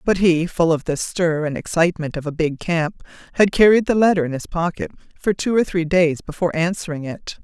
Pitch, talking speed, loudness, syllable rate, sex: 170 Hz, 220 wpm, -19 LUFS, 5.6 syllables/s, female